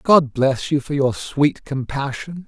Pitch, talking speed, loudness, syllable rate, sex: 140 Hz, 170 wpm, -20 LUFS, 3.8 syllables/s, male